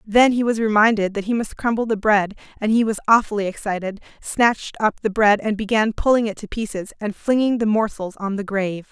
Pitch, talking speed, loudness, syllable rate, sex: 215 Hz, 215 wpm, -20 LUFS, 5.6 syllables/s, female